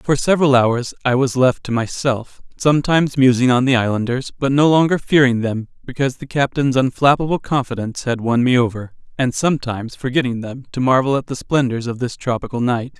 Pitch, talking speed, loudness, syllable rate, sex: 130 Hz, 180 wpm, -17 LUFS, 5.8 syllables/s, male